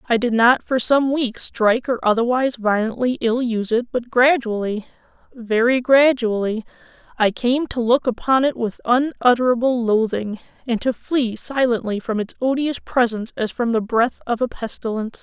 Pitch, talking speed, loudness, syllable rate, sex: 240 Hz, 155 wpm, -19 LUFS, 4.9 syllables/s, female